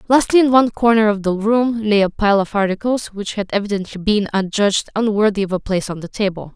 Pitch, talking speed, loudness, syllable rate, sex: 210 Hz, 220 wpm, -17 LUFS, 6.1 syllables/s, female